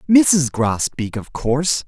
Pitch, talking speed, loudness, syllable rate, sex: 140 Hz, 130 wpm, -18 LUFS, 3.7 syllables/s, male